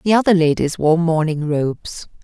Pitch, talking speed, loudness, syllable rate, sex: 165 Hz, 160 wpm, -17 LUFS, 5.0 syllables/s, female